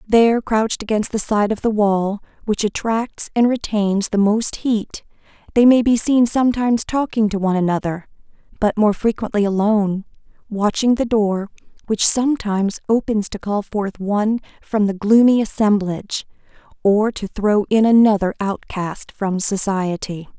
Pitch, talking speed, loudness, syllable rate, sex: 210 Hz, 145 wpm, -18 LUFS, 4.7 syllables/s, female